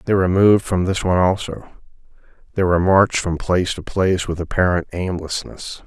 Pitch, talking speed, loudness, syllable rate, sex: 90 Hz, 175 wpm, -18 LUFS, 6.1 syllables/s, male